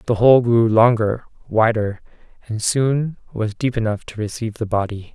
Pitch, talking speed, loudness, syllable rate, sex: 115 Hz, 165 wpm, -19 LUFS, 4.8 syllables/s, male